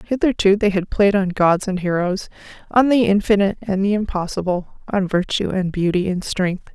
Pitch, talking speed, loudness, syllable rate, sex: 195 Hz, 180 wpm, -19 LUFS, 5.2 syllables/s, female